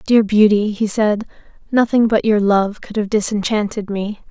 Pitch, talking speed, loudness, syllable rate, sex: 210 Hz, 165 wpm, -17 LUFS, 4.6 syllables/s, female